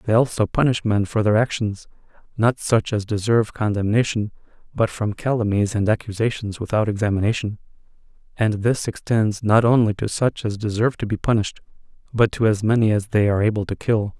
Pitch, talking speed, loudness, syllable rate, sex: 110 Hz, 175 wpm, -21 LUFS, 5.7 syllables/s, male